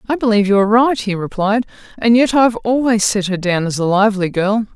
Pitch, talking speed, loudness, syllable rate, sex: 215 Hz, 240 wpm, -15 LUFS, 6.3 syllables/s, female